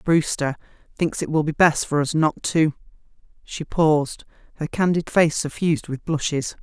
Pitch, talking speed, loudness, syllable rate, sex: 155 Hz, 155 wpm, -22 LUFS, 4.8 syllables/s, female